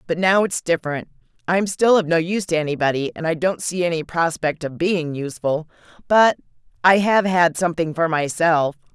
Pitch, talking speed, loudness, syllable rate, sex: 170 Hz, 175 wpm, -20 LUFS, 5.4 syllables/s, female